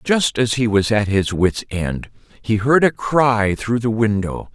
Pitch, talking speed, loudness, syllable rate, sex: 110 Hz, 200 wpm, -18 LUFS, 3.9 syllables/s, male